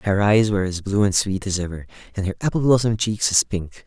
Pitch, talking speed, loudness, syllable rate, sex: 100 Hz, 250 wpm, -20 LUFS, 6.0 syllables/s, male